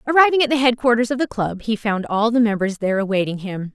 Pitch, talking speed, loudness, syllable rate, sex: 225 Hz, 240 wpm, -19 LUFS, 6.4 syllables/s, female